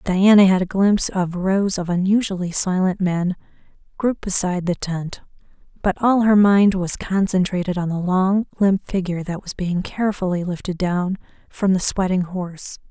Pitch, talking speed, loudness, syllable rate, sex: 185 Hz, 165 wpm, -19 LUFS, 5.0 syllables/s, female